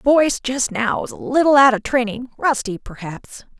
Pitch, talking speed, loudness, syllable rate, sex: 255 Hz, 185 wpm, -18 LUFS, 4.8 syllables/s, female